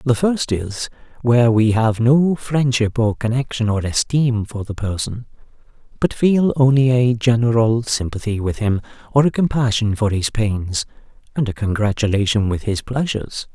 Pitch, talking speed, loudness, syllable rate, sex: 115 Hz, 155 wpm, -18 LUFS, 4.7 syllables/s, male